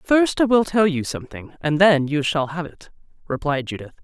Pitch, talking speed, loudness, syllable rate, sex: 165 Hz, 210 wpm, -20 LUFS, 5.1 syllables/s, female